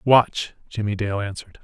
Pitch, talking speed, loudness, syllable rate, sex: 105 Hz, 145 wpm, -23 LUFS, 5.0 syllables/s, male